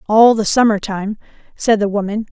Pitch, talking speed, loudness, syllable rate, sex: 210 Hz, 175 wpm, -15 LUFS, 5.1 syllables/s, female